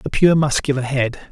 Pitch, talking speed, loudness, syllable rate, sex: 140 Hz, 185 wpm, -18 LUFS, 4.7 syllables/s, male